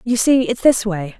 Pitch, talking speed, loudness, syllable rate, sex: 220 Hz, 250 wpm, -16 LUFS, 4.7 syllables/s, female